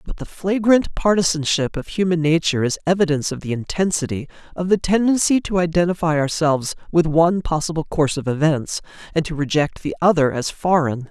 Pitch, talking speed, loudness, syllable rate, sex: 165 Hz, 165 wpm, -19 LUFS, 5.8 syllables/s, male